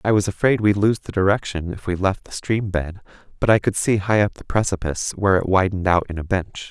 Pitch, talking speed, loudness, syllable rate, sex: 95 Hz, 250 wpm, -20 LUFS, 6.0 syllables/s, male